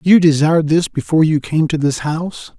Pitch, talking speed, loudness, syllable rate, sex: 155 Hz, 210 wpm, -15 LUFS, 5.7 syllables/s, male